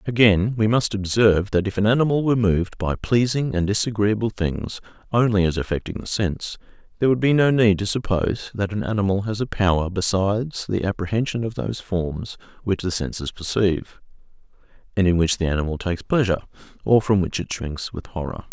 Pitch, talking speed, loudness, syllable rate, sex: 100 Hz, 185 wpm, -22 LUFS, 5.8 syllables/s, male